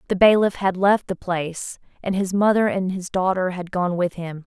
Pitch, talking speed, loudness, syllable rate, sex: 185 Hz, 210 wpm, -21 LUFS, 5.0 syllables/s, female